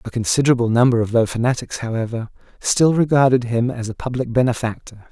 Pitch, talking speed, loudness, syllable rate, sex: 120 Hz, 165 wpm, -19 LUFS, 6.2 syllables/s, male